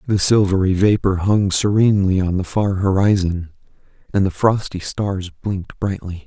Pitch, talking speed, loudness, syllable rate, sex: 95 Hz, 145 wpm, -18 LUFS, 4.7 syllables/s, male